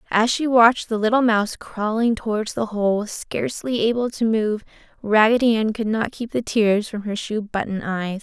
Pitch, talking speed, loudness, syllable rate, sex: 220 Hz, 190 wpm, -21 LUFS, 4.8 syllables/s, female